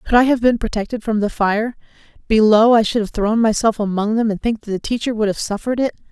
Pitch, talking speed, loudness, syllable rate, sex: 220 Hz, 235 wpm, -17 LUFS, 6.0 syllables/s, female